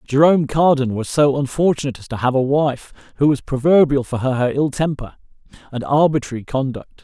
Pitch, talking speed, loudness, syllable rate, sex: 140 Hz, 170 wpm, -18 LUFS, 5.6 syllables/s, male